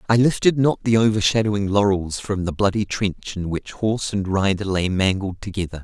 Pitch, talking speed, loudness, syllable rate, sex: 100 Hz, 185 wpm, -21 LUFS, 5.4 syllables/s, male